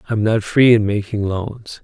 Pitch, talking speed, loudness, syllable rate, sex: 110 Hz, 195 wpm, -17 LUFS, 4.3 syllables/s, male